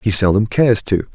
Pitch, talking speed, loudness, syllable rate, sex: 105 Hz, 210 wpm, -15 LUFS, 5.6 syllables/s, male